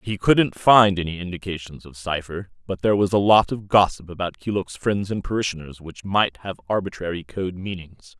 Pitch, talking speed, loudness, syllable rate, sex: 95 Hz, 185 wpm, -22 LUFS, 5.2 syllables/s, male